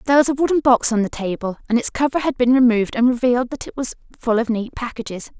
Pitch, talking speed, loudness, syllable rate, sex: 245 Hz, 255 wpm, -19 LUFS, 6.8 syllables/s, female